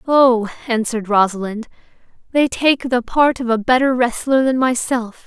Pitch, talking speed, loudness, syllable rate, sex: 245 Hz, 150 wpm, -17 LUFS, 4.7 syllables/s, female